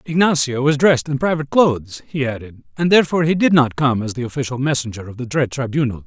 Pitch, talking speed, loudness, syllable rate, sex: 135 Hz, 220 wpm, -18 LUFS, 6.6 syllables/s, male